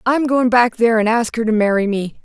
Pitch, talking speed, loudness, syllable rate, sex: 230 Hz, 270 wpm, -16 LUFS, 5.7 syllables/s, female